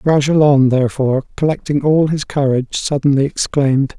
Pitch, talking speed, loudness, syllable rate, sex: 140 Hz, 120 wpm, -15 LUFS, 5.7 syllables/s, male